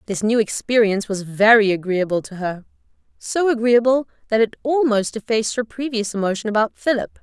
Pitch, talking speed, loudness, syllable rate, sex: 220 Hz, 160 wpm, -19 LUFS, 5.6 syllables/s, female